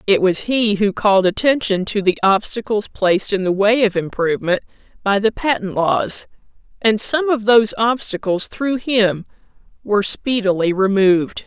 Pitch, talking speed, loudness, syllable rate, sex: 210 Hz, 150 wpm, -17 LUFS, 4.8 syllables/s, female